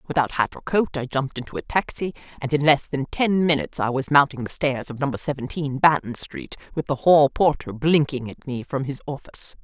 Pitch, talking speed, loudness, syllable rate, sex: 140 Hz, 220 wpm, -22 LUFS, 5.6 syllables/s, female